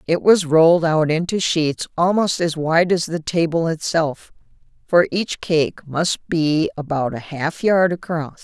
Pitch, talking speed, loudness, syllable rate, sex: 165 Hz, 165 wpm, -19 LUFS, 4.0 syllables/s, female